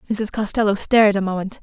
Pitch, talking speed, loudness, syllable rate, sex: 205 Hz, 185 wpm, -18 LUFS, 6.4 syllables/s, female